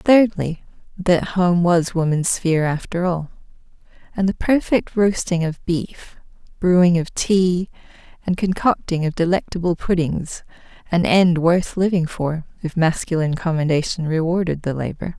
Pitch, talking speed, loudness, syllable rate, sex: 175 Hz, 130 wpm, -19 LUFS, 4.5 syllables/s, female